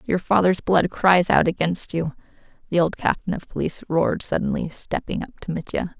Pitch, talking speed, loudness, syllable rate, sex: 170 Hz, 180 wpm, -22 LUFS, 5.3 syllables/s, female